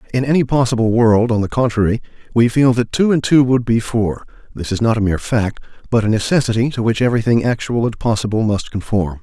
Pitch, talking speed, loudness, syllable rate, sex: 115 Hz, 215 wpm, -16 LUFS, 6.1 syllables/s, male